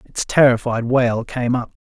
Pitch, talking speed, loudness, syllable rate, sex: 120 Hz, 165 wpm, -18 LUFS, 4.3 syllables/s, male